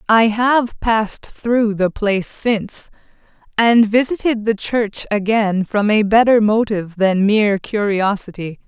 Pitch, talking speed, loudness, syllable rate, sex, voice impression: 215 Hz, 130 wpm, -16 LUFS, 4.2 syllables/s, female, feminine, middle-aged, slightly relaxed, slightly powerful, soft, clear, slightly halting, intellectual, friendly, reassuring, slightly elegant, lively, modest